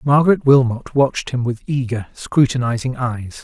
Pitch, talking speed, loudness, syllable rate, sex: 130 Hz, 140 wpm, -18 LUFS, 5.0 syllables/s, male